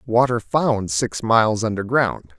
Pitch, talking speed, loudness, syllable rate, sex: 115 Hz, 150 wpm, -20 LUFS, 4.0 syllables/s, male